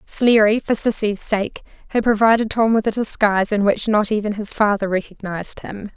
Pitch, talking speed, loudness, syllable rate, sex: 210 Hz, 180 wpm, -18 LUFS, 5.3 syllables/s, female